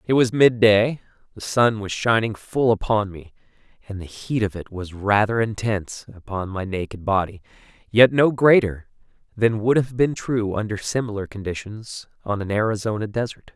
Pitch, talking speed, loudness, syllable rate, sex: 110 Hz, 165 wpm, -21 LUFS, 4.9 syllables/s, male